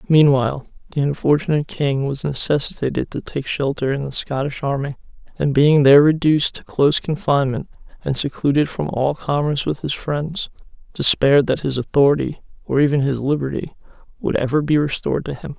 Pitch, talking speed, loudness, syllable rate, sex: 140 Hz, 160 wpm, -19 LUFS, 5.8 syllables/s, male